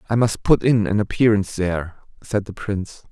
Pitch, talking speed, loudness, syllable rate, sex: 105 Hz, 195 wpm, -20 LUFS, 5.8 syllables/s, male